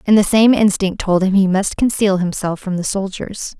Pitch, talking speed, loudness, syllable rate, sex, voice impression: 195 Hz, 215 wpm, -16 LUFS, 4.9 syllables/s, female, feminine, slightly young, tensed, slightly bright, clear, fluent, slightly cute, intellectual, slightly friendly, elegant, slightly sharp